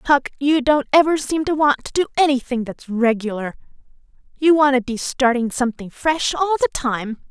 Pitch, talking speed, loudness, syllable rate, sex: 270 Hz, 180 wpm, -19 LUFS, 5.3 syllables/s, female